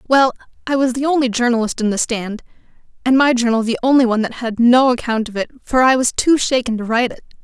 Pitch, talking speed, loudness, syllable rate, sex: 245 Hz, 235 wpm, -16 LUFS, 6.4 syllables/s, female